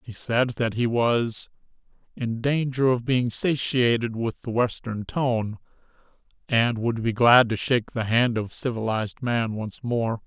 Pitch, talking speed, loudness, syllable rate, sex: 120 Hz, 160 wpm, -24 LUFS, 4.1 syllables/s, male